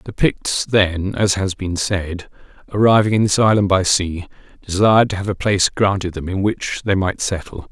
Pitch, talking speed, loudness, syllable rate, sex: 95 Hz, 195 wpm, -17 LUFS, 4.9 syllables/s, male